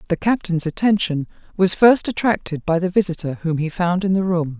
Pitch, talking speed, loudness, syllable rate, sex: 180 Hz, 195 wpm, -19 LUFS, 5.4 syllables/s, female